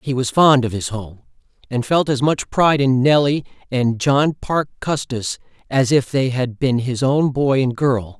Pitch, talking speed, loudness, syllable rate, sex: 130 Hz, 210 wpm, -18 LUFS, 4.5 syllables/s, male